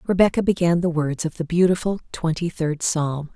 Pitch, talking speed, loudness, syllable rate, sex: 165 Hz, 180 wpm, -21 LUFS, 5.2 syllables/s, female